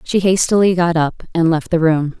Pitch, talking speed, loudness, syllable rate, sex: 170 Hz, 220 wpm, -15 LUFS, 4.9 syllables/s, female